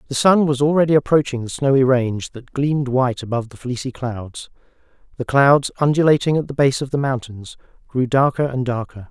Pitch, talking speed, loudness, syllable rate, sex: 130 Hz, 185 wpm, -18 LUFS, 5.7 syllables/s, male